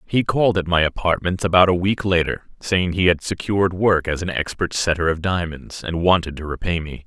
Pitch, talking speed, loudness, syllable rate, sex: 90 Hz, 210 wpm, -20 LUFS, 5.4 syllables/s, male